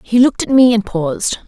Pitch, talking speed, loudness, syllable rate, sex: 230 Hz, 245 wpm, -14 LUFS, 5.8 syllables/s, female